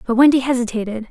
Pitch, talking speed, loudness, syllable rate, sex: 245 Hz, 160 wpm, -17 LUFS, 7.0 syllables/s, female